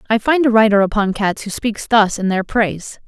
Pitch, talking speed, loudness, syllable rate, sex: 215 Hz, 235 wpm, -16 LUFS, 5.3 syllables/s, female